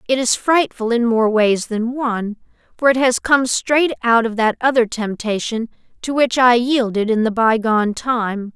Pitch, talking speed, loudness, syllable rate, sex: 235 Hz, 190 wpm, -17 LUFS, 4.4 syllables/s, female